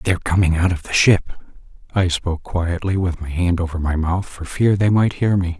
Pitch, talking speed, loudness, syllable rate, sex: 90 Hz, 225 wpm, -19 LUFS, 5.2 syllables/s, male